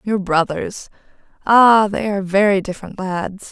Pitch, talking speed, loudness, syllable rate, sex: 195 Hz, 135 wpm, -16 LUFS, 4.6 syllables/s, female